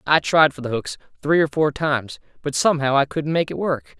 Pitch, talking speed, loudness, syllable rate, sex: 140 Hz, 240 wpm, -20 LUFS, 5.6 syllables/s, male